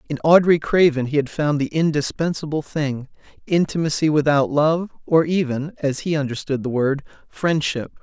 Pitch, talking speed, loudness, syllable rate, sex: 150 Hz, 140 wpm, -20 LUFS, 4.9 syllables/s, male